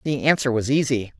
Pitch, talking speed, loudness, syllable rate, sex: 130 Hz, 200 wpm, -21 LUFS, 5.6 syllables/s, female